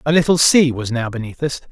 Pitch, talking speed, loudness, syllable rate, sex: 135 Hz, 245 wpm, -16 LUFS, 5.9 syllables/s, male